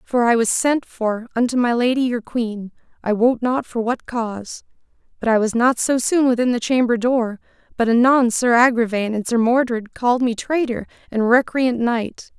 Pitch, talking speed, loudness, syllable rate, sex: 240 Hz, 190 wpm, -19 LUFS, 4.9 syllables/s, female